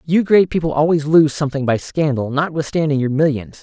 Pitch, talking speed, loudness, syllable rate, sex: 150 Hz, 180 wpm, -17 LUFS, 5.7 syllables/s, male